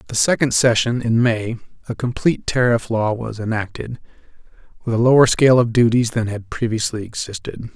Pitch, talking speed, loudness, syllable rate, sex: 115 Hz, 170 wpm, -18 LUFS, 5.5 syllables/s, male